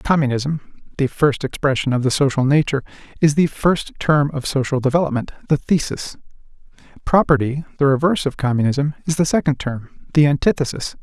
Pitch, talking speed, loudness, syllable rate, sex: 145 Hz, 130 wpm, -19 LUFS, 5.9 syllables/s, male